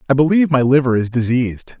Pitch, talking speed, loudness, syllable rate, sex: 135 Hz, 200 wpm, -15 LUFS, 6.8 syllables/s, male